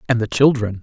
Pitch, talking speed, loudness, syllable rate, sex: 115 Hz, 220 wpm, -16 LUFS, 6.2 syllables/s, male